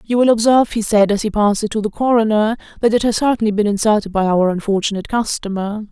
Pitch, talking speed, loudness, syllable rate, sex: 215 Hz, 225 wpm, -16 LUFS, 6.7 syllables/s, female